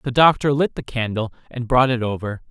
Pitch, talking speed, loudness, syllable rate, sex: 125 Hz, 215 wpm, -20 LUFS, 5.4 syllables/s, male